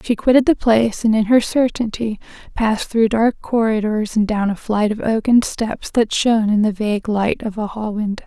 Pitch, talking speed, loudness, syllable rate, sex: 220 Hz, 210 wpm, -18 LUFS, 5.1 syllables/s, female